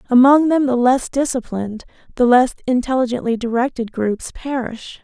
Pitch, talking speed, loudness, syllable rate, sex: 250 Hz, 130 wpm, -17 LUFS, 5.1 syllables/s, female